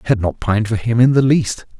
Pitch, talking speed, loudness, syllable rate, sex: 115 Hz, 300 wpm, -16 LUFS, 6.3 syllables/s, male